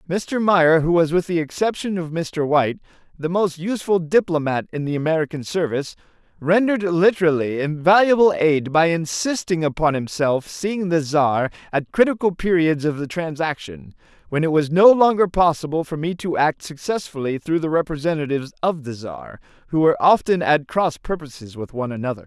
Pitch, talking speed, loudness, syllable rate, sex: 160 Hz, 165 wpm, -20 LUFS, 5.3 syllables/s, male